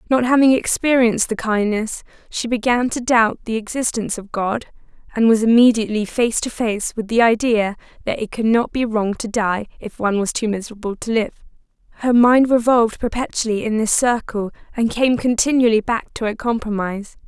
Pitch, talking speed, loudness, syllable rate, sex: 225 Hz, 175 wpm, -18 LUFS, 5.5 syllables/s, female